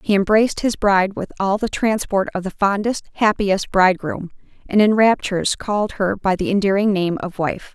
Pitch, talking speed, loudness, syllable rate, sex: 200 Hz, 185 wpm, -19 LUFS, 5.2 syllables/s, female